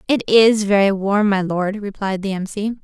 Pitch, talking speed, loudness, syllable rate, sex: 200 Hz, 210 wpm, -17 LUFS, 4.7 syllables/s, female